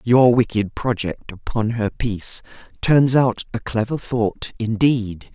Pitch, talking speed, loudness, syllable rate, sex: 115 Hz, 135 wpm, -20 LUFS, 3.9 syllables/s, female